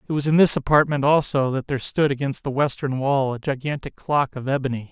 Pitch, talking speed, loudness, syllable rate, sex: 140 Hz, 220 wpm, -21 LUFS, 5.9 syllables/s, male